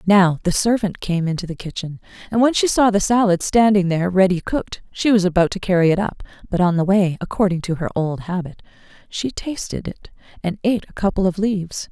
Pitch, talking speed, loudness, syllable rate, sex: 190 Hz, 210 wpm, -19 LUFS, 5.8 syllables/s, female